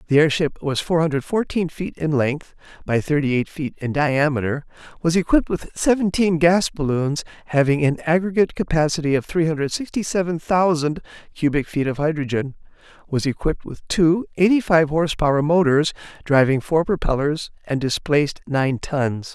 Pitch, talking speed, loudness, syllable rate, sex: 155 Hz, 160 wpm, -20 LUFS, 5.2 syllables/s, male